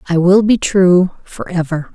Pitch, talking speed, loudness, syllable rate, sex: 180 Hz, 125 wpm, -13 LUFS, 4.2 syllables/s, female